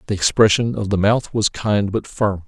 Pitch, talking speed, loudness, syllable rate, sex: 105 Hz, 220 wpm, -18 LUFS, 4.8 syllables/s, male